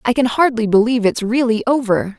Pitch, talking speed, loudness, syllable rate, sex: 235 Hz, 190 wpm, -16 LUFS, 5.8 syllables/s, female